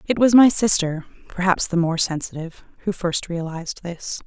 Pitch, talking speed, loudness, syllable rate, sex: 180 Hz, 170 wpm, -20 LUFS, 5.2 syllables/s, female